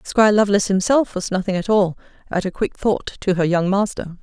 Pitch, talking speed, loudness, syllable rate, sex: 195 Hz, 215 wpm, -19 LUFS, 6.0 syllables/s, female